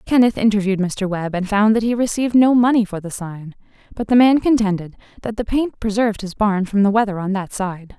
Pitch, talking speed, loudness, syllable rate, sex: 210 Hz, 225 wpm, -18 LUFS, 5.8 syllables/s, female